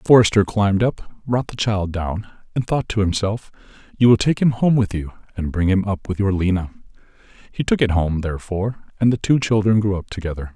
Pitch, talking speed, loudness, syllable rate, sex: 105 Hz, 215 wpm, -20 LUFS, 5.9 syllables/s, male